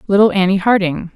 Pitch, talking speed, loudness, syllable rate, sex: 195 Hz, 155 wpm, -14 LUFS, 6.1 syllables/s, female